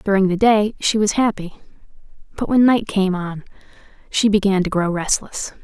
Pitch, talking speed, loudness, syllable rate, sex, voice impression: 200 Hz, 170 wpm, -18 LUFS, 5.0 syllables/s, female, feminine, slightly adult-like, slightly cute, sincere, slightly calm